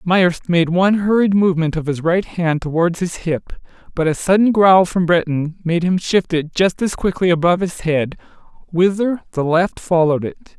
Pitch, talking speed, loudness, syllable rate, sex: 175 Hz, 185 wpm, -17 LUFS, 5.0 syllables/s, male